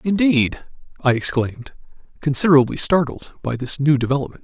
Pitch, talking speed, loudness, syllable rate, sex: 140 Hz, 120 wpm, -19 LUFS, 5.7 syllables/s, male